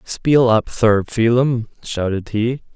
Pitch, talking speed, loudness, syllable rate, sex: 115 Hz, 130 wpm, -17 LUFS, 3.4 syllables/s, male